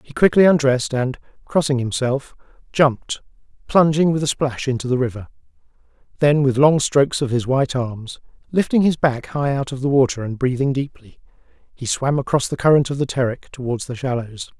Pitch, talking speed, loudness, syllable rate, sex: 135 Hz, 180 wpm, -19 LUFS, 5.5 syllables/s, male